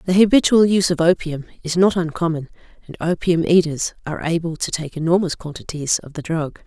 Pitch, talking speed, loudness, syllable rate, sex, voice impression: 170 Hz, 180 wpm, -19 LUFS, 5.8 syllables/s, female, feminine, very adult-like, slightly calm, elegant